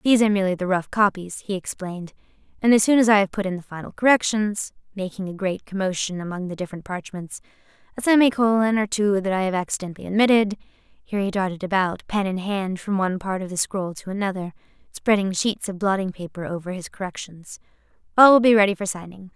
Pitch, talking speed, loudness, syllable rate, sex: 195 Hz, 205 wpm, -22 LUFS, 6.3 syllables/s, female